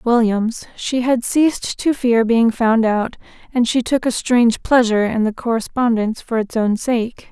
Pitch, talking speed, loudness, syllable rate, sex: 235 Hz, 180 wpm, -17 LUFS, 4.6 syllables/s, female